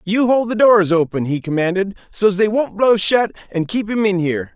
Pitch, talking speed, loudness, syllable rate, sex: 195 Hz, 225 wpm, -17 LUFS, 5.1 syllables/s, male